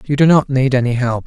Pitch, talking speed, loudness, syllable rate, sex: 130 Hz, 285 wpm, -14 LUFS, 6.0 syllables/s, male